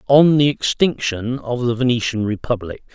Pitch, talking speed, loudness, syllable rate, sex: 125 Hz, 145 wpm, -18 LUFS, 4.8 syllables/s, male